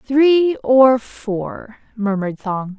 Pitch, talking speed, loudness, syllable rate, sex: 235 Hz, 110 wpm, -17 LUFS, 2.8 syllables/s, female